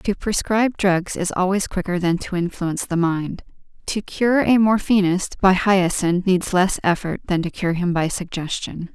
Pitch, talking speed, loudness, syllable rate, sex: 185 Hz, 175 wpm, -20 LUFS, 4.7 syllables/s, female